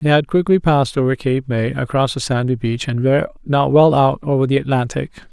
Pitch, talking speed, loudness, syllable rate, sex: 135 Hz, 215 wpm, -17 LUFS, 5.7 syllables/s, male